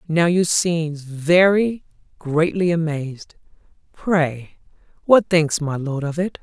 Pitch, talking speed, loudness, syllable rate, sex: 165 Hz, 120 wpm, -19 LUFS, 3.5 syllables/s, female